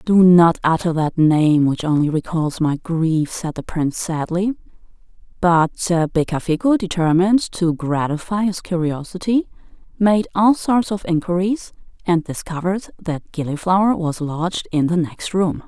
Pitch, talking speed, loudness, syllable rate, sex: 175 Hz, 140 wpm, -19 LUFS, 4.5 syllables/s, female